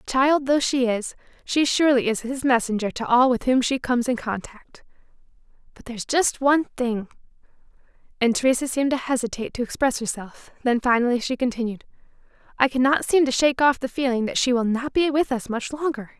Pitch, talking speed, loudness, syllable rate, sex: 250 Hz, 185 wpm, -22 LUFS, 5.9 syllables/s, female